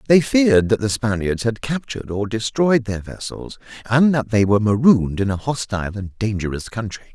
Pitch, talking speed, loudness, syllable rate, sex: 115 Hz, 185 wpm, -19 LUFS, 5.5 syllables/s, male